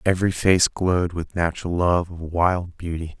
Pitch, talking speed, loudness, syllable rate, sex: 85 Hz, 170 wpm, -22 LUFS, 4.9 syllables/s, male